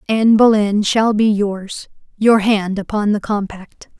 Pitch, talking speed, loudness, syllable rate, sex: 210 Hz, 150 wpm, -15 LUFS, 4.0 syllables/s, female